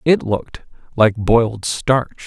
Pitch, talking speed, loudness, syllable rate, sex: 115 Hz, 135 wpm, -17 LUFS, 3.8 syllables/s, male